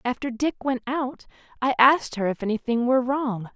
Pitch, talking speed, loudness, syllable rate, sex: 250 Hz, 185 wpm, -23 LUFS, 5.5 syllables/s, female